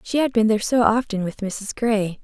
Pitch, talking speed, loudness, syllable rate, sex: 220 Hz, 240 wpm, -21 LUFS, 5.3 syllables/s, female